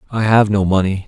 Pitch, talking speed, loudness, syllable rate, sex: 100 Hz, 225 wpm, -15 LUFS, 5.9 syllables/s, male